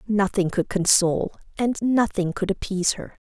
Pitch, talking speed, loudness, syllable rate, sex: 200 Hz, 145 wpm, -23 LUFS, 5.0 syllables/s, female